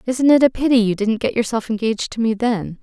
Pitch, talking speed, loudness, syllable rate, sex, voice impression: 230 Hz, 255 wpm, -18 LUFS, 6.0 syllables/s, female, feminine, adult-like, tensed, clear, fluent, intellectual, calm, reassuring, elegant, slightly strict, slightly sharp